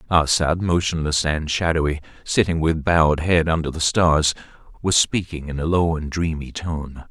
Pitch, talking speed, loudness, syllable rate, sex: 80 Hz, 160 wpm, -20 LUFS, 4.8 syllables/s, male